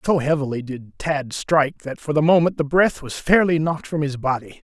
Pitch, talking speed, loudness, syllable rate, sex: 150 Hz, 215 wpm, -20 LUFS, 5.3 syllables/s, male